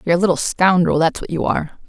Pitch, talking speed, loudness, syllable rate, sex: 175 Hz, 255 wpm, -17 LUFS, 7.4 syllables/s, female